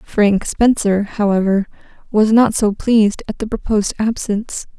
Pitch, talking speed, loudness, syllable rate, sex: 210 Hz, 140 wpm, -16 LUFS, 4.6 syllables/s, female